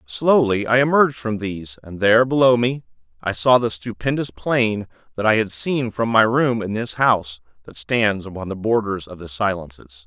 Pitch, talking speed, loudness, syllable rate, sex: 110 Hz, 190 wpm, -19 LUFS, 5.0 syllables/s, male